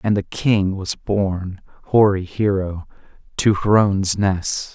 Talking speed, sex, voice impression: 125 wpm, male, masculine, adult-like, tensed, slightly powerful, slightly dark, slightly muffled, cool, intellectual, sincere, slightly mature, friendly, reassuring, wild, lively, slightly kind, modest